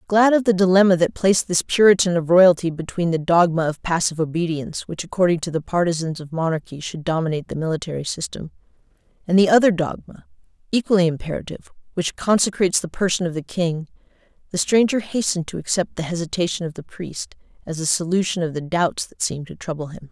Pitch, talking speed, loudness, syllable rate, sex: 175 Hz, 185 wpm, -20 LUFS, 6.3 syllables/s, female